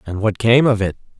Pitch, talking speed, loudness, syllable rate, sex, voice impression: 110 Hz, 250 wpm, -16 LUFS, 5.8 syllables/s, male, masculine, adult-like, tensed, clear, slightly muffled, slightly nasal, cool, intellectual, unique, lively, strict